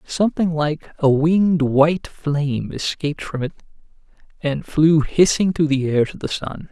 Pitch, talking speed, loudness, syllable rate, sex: 155 Hz, 160 wpm, -19 LUFS, 4.6 syllables/s, male